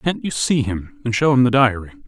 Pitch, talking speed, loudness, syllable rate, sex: 130 Hz, 260 wpm, -18 LUFS, 5.6 syllables/s, male